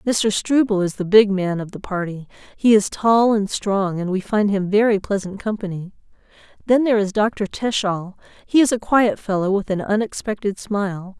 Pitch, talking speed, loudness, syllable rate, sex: 205 Hz, 190 wpm, -19 LUFS, 4.9 syllables/s, female